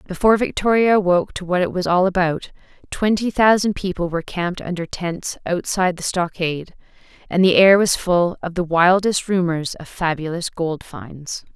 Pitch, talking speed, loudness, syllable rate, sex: 180 Hz, 165 wpm, -19 LUFS, 5.2 syllables/s, female